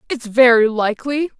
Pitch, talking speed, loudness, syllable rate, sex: 245 Hz, 130 wpm, -15 LUFS, 5.3 syllables/s, female